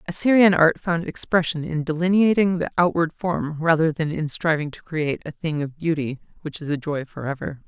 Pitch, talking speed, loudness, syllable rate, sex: 160 Hz, 195 wpm, -22 LUFS, 5.4 syllables/s, female